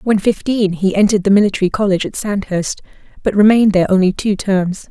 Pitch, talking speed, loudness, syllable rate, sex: 200 Hz, 185 wpm, -15 LUFS, 6.4 syllables/s, female